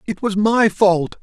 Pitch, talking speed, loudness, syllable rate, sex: 205 Hz, 195 wpm, -16 LUFS, 3.7 syllables/s, male